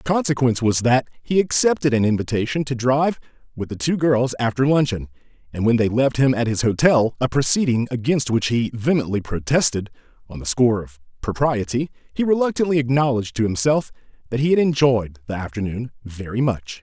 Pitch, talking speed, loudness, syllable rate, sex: 125 Hz, 175 wpm, -20 LUFS, 5.8 syllables/s, male